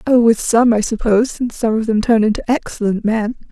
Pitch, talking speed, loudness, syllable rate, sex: 225 Hz, 220 wpm, -16 LUFS, 5.9 syllables/s, female